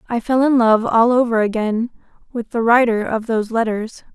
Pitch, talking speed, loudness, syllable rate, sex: 230 Hz, 175 wpm, -17 LUFS, 5.2 syllables/s, female